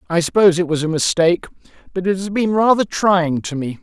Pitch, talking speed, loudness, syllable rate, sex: 175 Hz, 220 wpm, -17 LUFS, 6.1 syllables/s, male